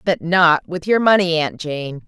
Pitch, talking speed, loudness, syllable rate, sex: 170 Hz, 200 wpm, -17 LUFS, 4.2 syllables/s, female